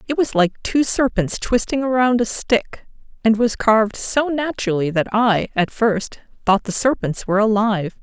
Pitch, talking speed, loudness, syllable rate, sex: 225 Hz, 170 wpm, -19 LUFS, 4.7 syllables/s, female